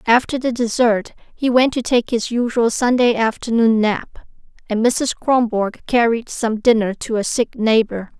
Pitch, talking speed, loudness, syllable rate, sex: 230 Hz, 160 wpm, -18 LUFS, 4.4 syllables/s, female